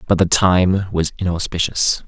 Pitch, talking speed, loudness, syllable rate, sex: 90 Hz, 145 wpm, -17 LUFS, 4.5 syllables/s, male